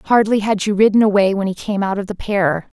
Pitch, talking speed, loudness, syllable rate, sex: 200 Hz, 260 wpm, -17 LUFS, 5.6 syllables/s, female